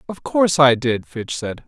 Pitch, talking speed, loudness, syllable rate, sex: 140 Hz, 215 wpm, -18 LUFS, 4.7 syllables/s, male